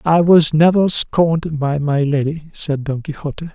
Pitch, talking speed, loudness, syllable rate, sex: 155 Hz, 170 wpm, -16 LUFS, 4.5 syllables/s, male